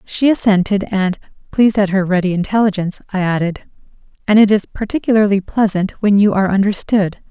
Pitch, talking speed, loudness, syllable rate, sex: 200 Hz, 155 wpm, -15 LUFS, 5.9 syllables/s, female